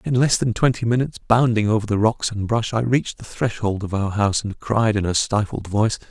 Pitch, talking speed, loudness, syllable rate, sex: 110 Hz, 235 wpm, -20 LUFS, 5.7 syllables/s, male